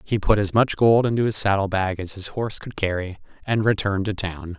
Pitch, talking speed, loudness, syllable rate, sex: 100 Hz, 235 wpm, -22 LUFS, 5.6 syllables/s, male